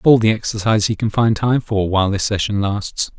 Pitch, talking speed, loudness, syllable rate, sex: 105 Hz, 245 wpm, -17 LUFS, 5.8 syllables/s, male